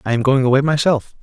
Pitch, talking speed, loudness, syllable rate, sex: 135 Hz, 245 wpm, -16 LUFS, 6.5 syllables/s, male